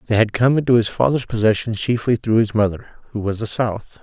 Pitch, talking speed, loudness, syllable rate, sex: 115 Hz, 225 wpm, -19 LUFS, 5.9 syllables/s, male